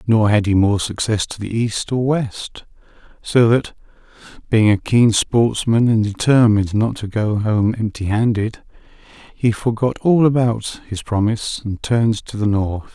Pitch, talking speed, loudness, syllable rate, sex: 110 Hz, 160 wpm, -17 LUFS, 4.4 syllables/s, male